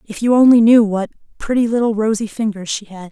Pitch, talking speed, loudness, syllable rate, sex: 220 Hz, 210 wpm, -15 LUFS, 5.8 syllables/s, female